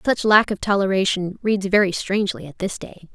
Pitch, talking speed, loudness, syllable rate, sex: 190 Hz, 190 wpm, -20 LUFS, 5.6 syllables/s, female